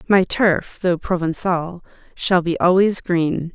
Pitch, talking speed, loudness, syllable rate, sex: 180 Hz, 135 wpm, -19 LUFS, 3.6 syllables/s, female